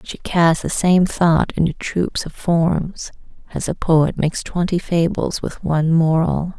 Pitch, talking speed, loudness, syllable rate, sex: 170 Hz, 165 wpm, -18 LUFS, 4.0 syllables/s, female